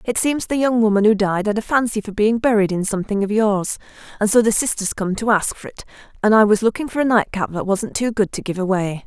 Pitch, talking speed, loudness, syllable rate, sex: 210 Hz, 265 wpm, -18 LUFS, 6.1 syllables/s, female